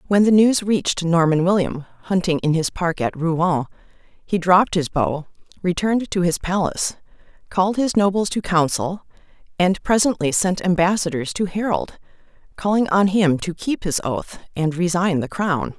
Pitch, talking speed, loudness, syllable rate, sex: 180 Hz, 160 wpm, -20 LUFS, 4.8 syllables/s, female